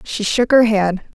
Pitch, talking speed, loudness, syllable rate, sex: 215 Hz, 200 wpm, -15 LUFS, 4.1 syllables/s, female